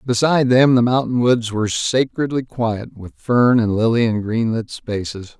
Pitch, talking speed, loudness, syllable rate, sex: 115 Hz, 180 wpm, -18 LUFS, 4.4 syllables/s, male